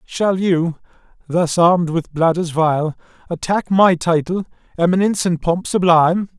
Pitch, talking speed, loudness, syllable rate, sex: 175 Hz, 130 wpm, -17 LUFS, 4.6 syllables/s, male